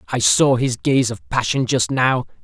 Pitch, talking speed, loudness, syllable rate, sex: 120 Hz, 195 wpm, -18 LUFS, 4.4 syllables/s, male